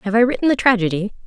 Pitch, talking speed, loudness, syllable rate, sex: 220 Hz, 240 wpm, -17 LUFS, 7.6 syllables/s, female